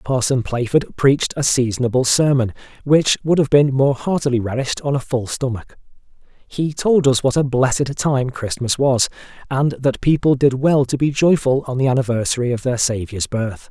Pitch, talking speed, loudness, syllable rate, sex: 130 Hz, 180 wpm, -18 LUFS, 5.1 syllables/s, male